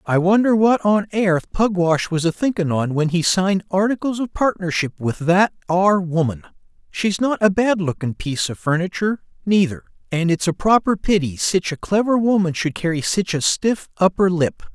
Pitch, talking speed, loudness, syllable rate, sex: 185 Hz, 185 wpm, -19 LUFS, 5.0 syllables/s, male